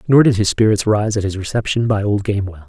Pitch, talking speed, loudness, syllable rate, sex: 105 Hz, 245 wpm, -17 LUFS, 6.4 syllables/s, male